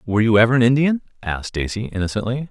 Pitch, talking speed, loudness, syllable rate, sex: 115 Hz, 190 wpm, -19 LUFS, 7.3 syllables/s, male